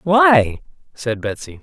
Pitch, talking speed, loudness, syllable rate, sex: 150 Hz, 110 wpm, -17 LUFS, 3.3 syllables/s, male